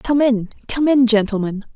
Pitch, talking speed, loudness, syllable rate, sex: 235 Hz, 170 wpm, -17 LUFS, 4.8 syllables/s, female